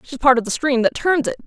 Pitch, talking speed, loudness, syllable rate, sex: 280 Hz, 330 wpm, -18 LUFS, 6.3 syllables/s, female